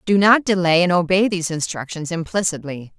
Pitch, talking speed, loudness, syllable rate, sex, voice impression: 175 Hz, 140 wpm, -18 LUFS, 5.6 syllables/s, female, very feminine, adult-like, middle-aged, thin, tensed, powerful, bright, very hard, very clear, fluent, slightly cute, cool, very intellectual, refreshing, very sincere, very calm, very friendly, very reassuring, very unique, elegant, slightly wild, slightly sweet, lively, slightly strict, slightly intense, slightly sharp